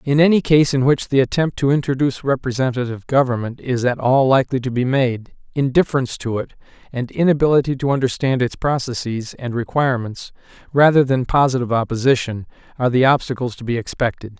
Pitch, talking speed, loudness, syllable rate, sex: 130 Hz, 165 wpm, -18 LUFS, 6.1 syllables/s, male